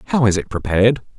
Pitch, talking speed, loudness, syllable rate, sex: 110 Hz, 205 wpm, -17 LUFS, 7.4 syllables/s, male